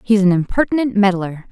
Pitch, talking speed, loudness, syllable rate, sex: 205 Hz, 160 wpm, -16 LUFS, 5.7 syllables/s, female